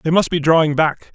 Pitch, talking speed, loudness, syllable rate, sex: 160 Hz, 260 wpm, -16 LUFS, 5.7 syllables/s, male